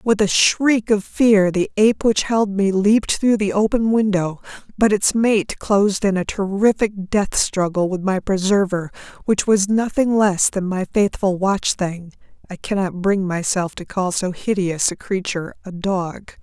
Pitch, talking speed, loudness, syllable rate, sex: 200 Hz, 175 wpm, -18 LUFS, 4.3 syllables/s, female